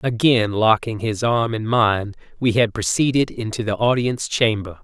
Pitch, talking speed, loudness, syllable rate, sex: 115 Hz, 160 wpm, -19 LUFS, 4.7 syllables/s, male